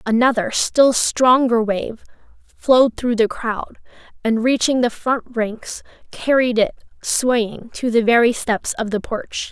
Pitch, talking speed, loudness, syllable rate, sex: 235 Hz, 145 wpm, -18 LUFS, 3.8 syllables/s, female